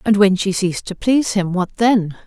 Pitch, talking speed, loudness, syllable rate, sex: 200 Hz, 240 wpm, -17 LUFS, 5.3 syllables/s, female